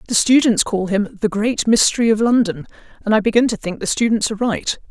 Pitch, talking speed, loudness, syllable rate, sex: 215 Hz, 220 wpm, -17 LUFS, 5.9 syllables/s, female